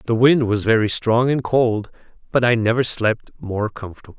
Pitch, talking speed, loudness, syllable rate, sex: 115 Hz, 185 wpm, -19 LUFS, 5.0 syllables/s, male